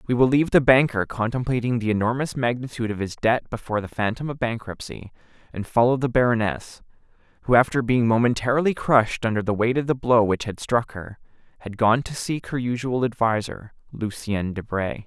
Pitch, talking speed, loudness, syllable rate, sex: 115 Hz, 180 wpm, -22 LUFS, 5.7 syllables/s, male